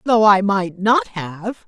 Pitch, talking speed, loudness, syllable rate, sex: 210 Hz, 180 wpm, -17 LUFS, 4.2 syllables/s, female